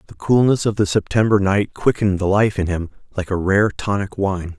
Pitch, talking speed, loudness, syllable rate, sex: 100 Hz, 210 wpm, -18 LUFS, 5.4 syllables/s, male